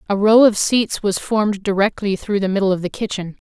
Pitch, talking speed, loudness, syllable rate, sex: 200 Hz, 225 wpm, -18 LUFS, 5.6 syllables/s, female